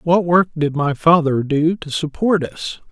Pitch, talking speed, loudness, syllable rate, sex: 160 Hz, 185 wpm, -17 LUFS, 4.2 syllables/s, male